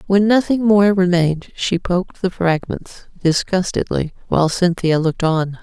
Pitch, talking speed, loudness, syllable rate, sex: 180 Hz, 140 wpm, -17 LUFS, 4.7 syllables/s, female